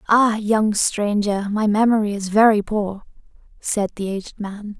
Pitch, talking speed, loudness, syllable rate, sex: 210 Hz, 150 wpm, -20 LUFS, 4.3 syllables/s, female